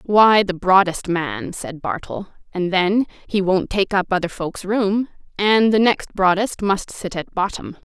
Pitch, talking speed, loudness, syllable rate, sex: 195 Hz, 175 wpm, -19 LUFS, 4.1 syllables/s, female